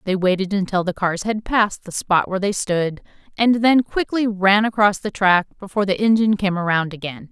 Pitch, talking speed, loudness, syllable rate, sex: 200 Hz, 205 wpm, -19 LUFS, 5.5 syllables/s, female